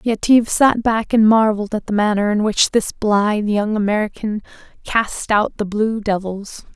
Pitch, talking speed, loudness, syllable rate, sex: 215 Hz, 170 wpm, -17 LUFS, 4.7 syllables/s, female